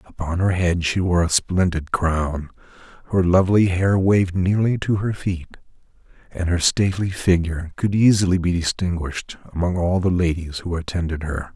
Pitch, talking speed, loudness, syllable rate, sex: 90 Hz, 160 wpm, -20 LUFS, 5.1 syllables/s, male